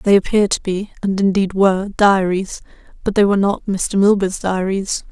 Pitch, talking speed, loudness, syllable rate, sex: 195 Hz, 175 wpm, -17 LUFS, 5.2 syllables/s, female